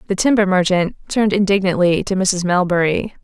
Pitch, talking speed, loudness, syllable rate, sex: 190 Hz, 150 wpm, -16 LUFS, 5.5 syllables/s, female